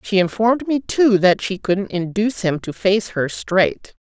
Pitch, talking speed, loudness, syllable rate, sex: 200 Hz, 195 wpm, -18 LUFS, 4.4 syllables/s, female